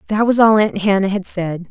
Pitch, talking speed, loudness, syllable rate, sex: 200 Hz, 245 wpm, -15 LUFS, 5.3 syllables/s, female